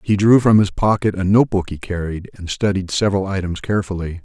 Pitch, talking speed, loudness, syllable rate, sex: 95 Hz, 200 wpm, -18 LUFS, 6.1 syllables/s, male